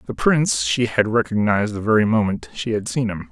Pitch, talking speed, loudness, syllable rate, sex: 110 Hz, 215 wpm, -20 LUFS, 5.8 syllables/s, male